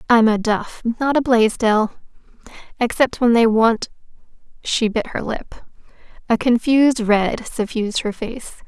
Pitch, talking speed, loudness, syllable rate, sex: 230 Hz, 130 wpm, -18 LUFS, 4.4 syllables/s, female